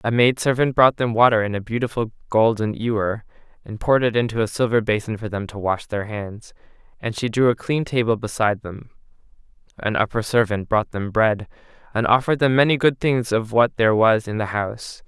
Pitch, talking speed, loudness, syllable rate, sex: 115 Hz, 205 wpm, -20 LUFS, 5.6 syllables/s, male